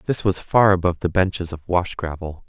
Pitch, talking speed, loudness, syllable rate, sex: 90 Hz, 220 wpm, -20 LUFS, 5.8 syllables/s, male